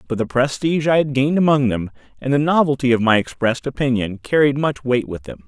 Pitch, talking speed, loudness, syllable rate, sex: 130 Hz, 220 wpm, -18 LUFS, 6.2 syllables/s, male